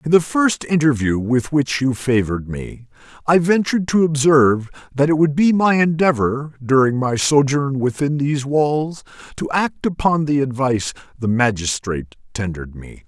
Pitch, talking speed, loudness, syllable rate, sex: 140 Hz, 155 wpm, -18 LUFS, 4.9 syllables/s, male